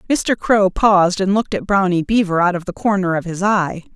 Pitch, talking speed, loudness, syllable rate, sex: 190 Hz, 225 wpm, -17 LUFS, 5.5 syllables/s, female